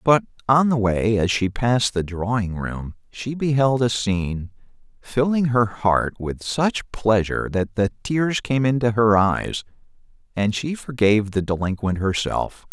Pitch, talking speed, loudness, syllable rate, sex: 110 Hz, 155 wpm, -21 LUFS, 4.2 syllables/s, male